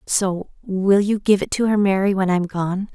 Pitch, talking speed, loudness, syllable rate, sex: 195 Hz, 225 wpm, -19 LUFS, 4.5 syllables/s, female